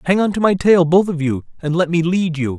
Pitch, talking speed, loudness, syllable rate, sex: 170 Hz, 280 wpm, -16 LUFS, 5.7 syllables/s, male